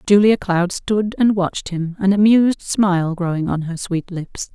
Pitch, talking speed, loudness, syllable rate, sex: 190 Hz, 185 wpm, -18 LUFS, 4.6 syllables/s, female